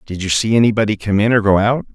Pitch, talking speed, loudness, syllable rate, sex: 105 Hz, 275 wpm, -15 LUFS, 6.8 syllables/s, male